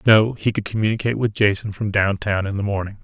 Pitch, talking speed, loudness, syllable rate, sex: 105 Hz, 220 wpm, -20 LUFS, 6.2 syllables/s, male